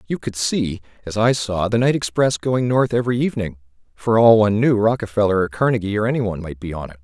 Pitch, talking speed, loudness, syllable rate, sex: 110 Hz, 220 wpm, -19 LUFS, 6.2 syllables/s, male